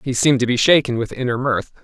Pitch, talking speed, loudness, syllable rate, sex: 125 Hz, 260 wpm, -17 LUFS, 6.7 syllables/s, male